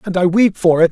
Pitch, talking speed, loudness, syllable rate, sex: 180 Hz, 330 wpm, -14 LUFS, 5.8 syllables/s, male